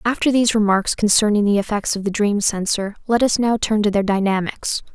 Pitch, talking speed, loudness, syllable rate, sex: 210 Hz, 205 wpm, -18 LUFS, 5.6 syllables/s, female